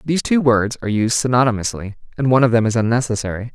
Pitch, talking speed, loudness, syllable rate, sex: 120 Hz, 205 wpm, -17 LUFS, 7.2 syllables/s, male